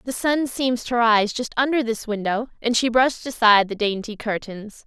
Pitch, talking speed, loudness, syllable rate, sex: 230 Hz, 195 wpm, -21 LUFS, 5.0 syllables/s, female